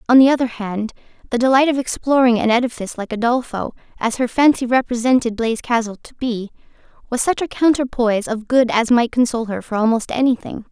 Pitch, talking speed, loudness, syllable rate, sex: 240 Hz, 185 wpm, -18 LUFS, 6.1 syllables/s, female